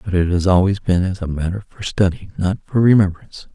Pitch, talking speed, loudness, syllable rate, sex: 95 Hz, 220 wpm, -18 LUFS, 5.9 syllables/s, male